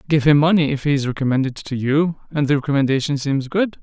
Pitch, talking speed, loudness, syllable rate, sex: 145 Hz, 220 wpm, -19 LUFS, 6.3 syllables/s, male